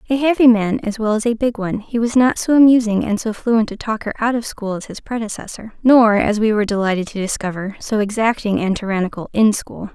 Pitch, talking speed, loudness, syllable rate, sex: 220 Hz, 230 wpm, -17 LUFS, 5.9 syllables/s, female